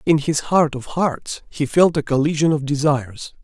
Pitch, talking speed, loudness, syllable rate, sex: 150 Hz, 190 wpm, -19 LUFS, 4.7 syllables/s, male